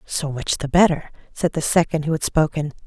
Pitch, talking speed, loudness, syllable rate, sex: 155 Hz, 210 wpm, -20 LUFS, 5.4 syllables/s, female